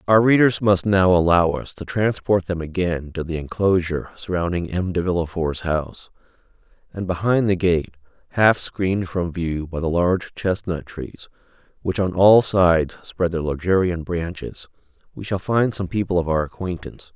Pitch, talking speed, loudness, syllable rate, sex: 90 Hz, 165 wpm, -21 LUFS, 4.9 syllables/s, male